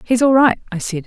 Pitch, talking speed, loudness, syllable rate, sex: 230 Hz, 285 wpm, -15 LUFS, 6.0 syllables/s, female